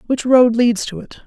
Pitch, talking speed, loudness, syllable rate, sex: 235 Hz, 235 wpm, -14 LUFS, 4.6 syllables/s, female